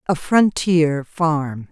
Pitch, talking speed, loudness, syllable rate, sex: 160 Hz, 105 wpm, -18 LUFS, 2.6 syllables/s, female